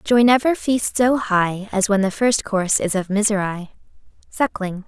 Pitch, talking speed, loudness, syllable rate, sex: 210 Hz, 170 wpm, -19 LUFS, 4.6 syllables/s, female